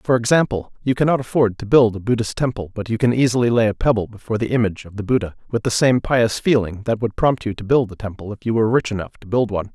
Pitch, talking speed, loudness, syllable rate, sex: 115 Hz, 265 wpm, -19 LUFS, 6.7 syllables/s, male